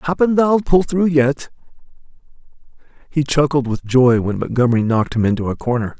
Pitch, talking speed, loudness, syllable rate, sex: 140 Hz, 160 wpm, -17 LUFS, 5.5 syllables/s, male